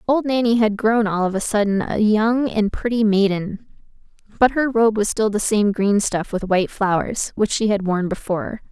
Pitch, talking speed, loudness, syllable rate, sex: 210 Hz, 205 wpm, -19 LUFS, 4.9 syllables/s, female